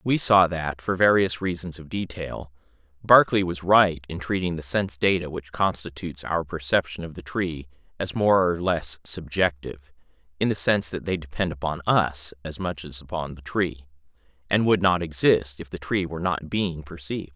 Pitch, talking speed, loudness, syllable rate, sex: 85 Hz, 185 wpm, -24 LUFS, 5.1 syllables/s, male